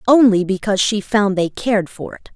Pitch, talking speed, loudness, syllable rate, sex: 205 Hz, 205 wpm, -16 LUFS, 5.6 syllables/s, female